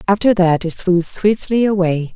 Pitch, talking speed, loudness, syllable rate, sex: 190 Hz, 165 wpm, -16 LUFS, 4.5 syllables/s, female